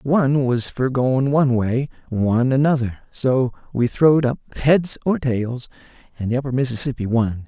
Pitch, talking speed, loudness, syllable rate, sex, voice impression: 130 Hz, 160 wpm, -20 LUFS, 4.9 syllables/s, male, masculine, slightly adult-like, slightly thick, tensed, slightly weak, bright, slightly soft, clear, slightly fluent, slightly raspy, cool, slightly intellectual, refreshing, sincere, slightly calm, friendly, reassuring, unique, slightly elegant, wild, slightly sweet, lively, slightly kind, slightly intense, slightly light